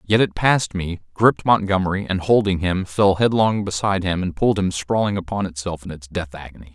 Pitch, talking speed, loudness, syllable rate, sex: 95 Hz, 205 wpm, -20 LUFS, 5.8 syllables/s, male